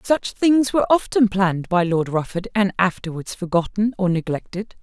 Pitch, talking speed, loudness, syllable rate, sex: 195 Hz, 160 wpm, -20 LUFS, 5.1 syllables/s, female